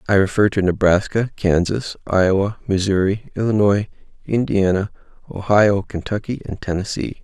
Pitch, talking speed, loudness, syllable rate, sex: 100 Hz, 110 wpm, -19 LUFS, 5.0 syllables/s, male